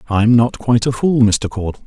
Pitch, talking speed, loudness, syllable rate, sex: 115 Hz, 225 wpm, -15 LUFS, 5.5 syllables/s, male